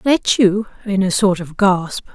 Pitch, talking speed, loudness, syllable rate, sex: 195 Hz, 195 wpm, -16 LUFS, 4.0 syllables/s, female